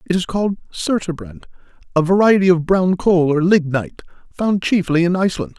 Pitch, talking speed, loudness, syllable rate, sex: 175 Hz, 160 wpm, -17 LUFS, 5.5 syllables/s, male